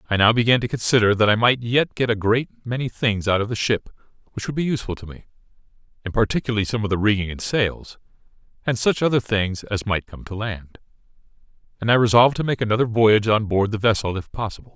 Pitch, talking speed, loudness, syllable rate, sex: 110 Hz, 220 wpm, -21 LUFS, 6.4 syllables/s, male